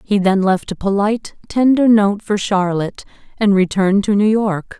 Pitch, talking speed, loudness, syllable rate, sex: 200 Hz, 175 wpm, -16 LUFS, 5.0 syllables/s, female